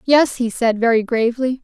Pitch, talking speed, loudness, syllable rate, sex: 240 Hz, 185 wpm, -17 LUFS, 5.2 syllables/s, female